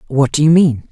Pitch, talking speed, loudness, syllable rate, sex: 145 Hz, 265 wpm, -12 LUFS, 5.5 syllables/s, female